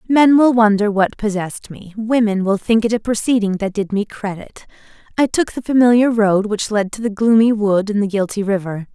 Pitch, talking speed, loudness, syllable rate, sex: 215 Hz, 195 wpm, -16 LUFS, 5.3 syllables/s, female